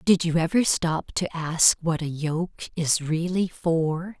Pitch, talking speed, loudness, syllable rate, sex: 165 Hz, 170 wpm, -24 LUFS, 3.5 syllables/s, female